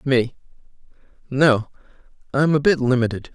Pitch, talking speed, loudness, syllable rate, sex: 135 Hz, 110 wpm, -20 LUFS, 4.7 syllables/s, male